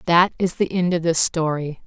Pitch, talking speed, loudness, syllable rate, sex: 170 Hz, 225 wpm, -20 LUFS, 4.9 syllables/s, female